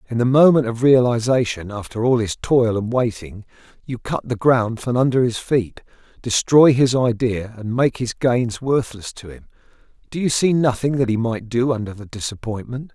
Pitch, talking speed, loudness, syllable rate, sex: 120 Hz, 185 wpm, -19 LUFS, 4.9 syllables/s, male